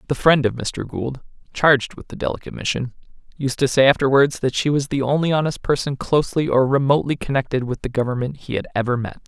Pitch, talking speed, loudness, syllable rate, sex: 135 Hz, 205 wpm, -20 LUFS, 6.3 syllables/s, male